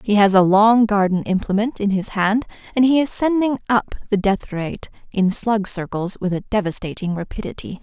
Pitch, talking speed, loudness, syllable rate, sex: 205 Hz, 185 wpm, -19 LUFS, 5.0 syllables/s, female